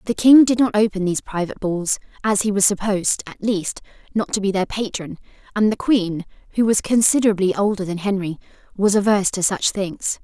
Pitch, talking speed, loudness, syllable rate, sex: 200 Hz, 195 wpm, -19 LUFS, 5.7 syllables/s, female